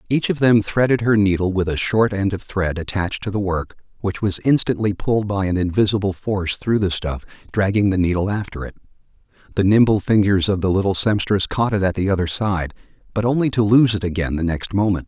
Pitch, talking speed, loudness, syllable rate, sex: 100 Hz, 215 wpm, -19 LUFS, 5.7 syllables/s, male